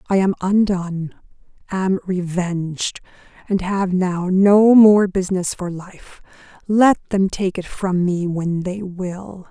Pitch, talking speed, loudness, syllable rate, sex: 185 Hz, 140 wpm, -18 LUFS, 3.6 syllables/s, female